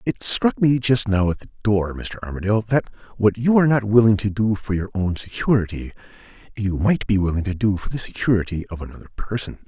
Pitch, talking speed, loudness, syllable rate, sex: 105 Hz, 210 wpm, -21 LUFS, 6.0 syllables/s, male